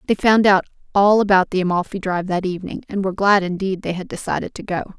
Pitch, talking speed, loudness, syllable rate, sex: 190 Hz, 230 wpm, -19 LUFS, 6.5 syllables/s, female